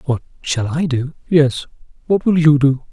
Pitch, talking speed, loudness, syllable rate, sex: 145 Hz, 165 wpm, -16 LUFS, 4.4 syllables/s, male